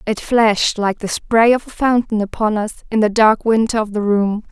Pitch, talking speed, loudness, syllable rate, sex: 215 Hz, 225 wpm, -16 LUFS, 4.9 syllables/s, female